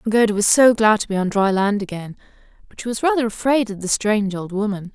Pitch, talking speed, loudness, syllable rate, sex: 210 Hz, 255 wpm, -18 LUFS, 6.2 syllables/s, female